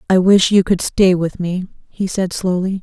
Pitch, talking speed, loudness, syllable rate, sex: 185 Hz, 215 wpm, -16 LUFS, 4.6 syllables/s, female